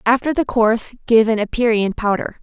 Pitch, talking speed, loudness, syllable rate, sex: 230 Hz, 175 wpm, -17 LUFS, 5.4 syllables/s, female